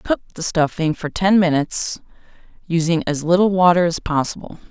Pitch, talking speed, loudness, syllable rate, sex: 170 Hz, 155 wpm, -18 LUFS, 5.3 syllables/s, female